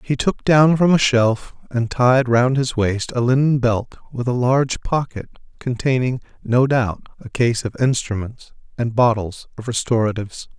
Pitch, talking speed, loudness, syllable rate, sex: 125 Hz, 165 wpm, -18 LUFS, 4.6 syllables/s, male